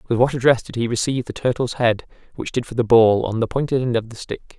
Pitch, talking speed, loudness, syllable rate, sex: 120 Hz, 275 wpm, -20 LUFS, 6.3 syllables/s, male